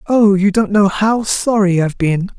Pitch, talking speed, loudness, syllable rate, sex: 200 Hz, 200 wpm, -14 LUFS, 4.6 syllables/s, male